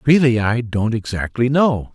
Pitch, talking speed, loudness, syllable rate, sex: 120 Hz, 155 wpm, -18 LUFS, 4.4 syllables/s, male